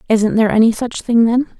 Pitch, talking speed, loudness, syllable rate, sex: 230 Hz, 225 wpm, -14 LUFS, 6.2 syllables/s, female